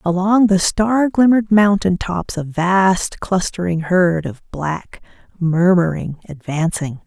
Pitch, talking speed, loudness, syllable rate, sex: 180 Hz, 120 wpm, -17 LUFS, 3.8 syllables/s, female